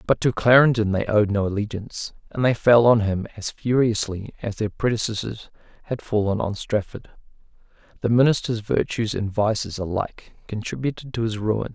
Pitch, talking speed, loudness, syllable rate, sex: 110 Hz, 160 wpm, -22 LUFS, 5.2 syllables/s, male